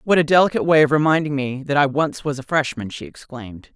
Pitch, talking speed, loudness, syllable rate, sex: 145 Hz, 240 wpm, -18 LUFS, 6.4 syllables/s, female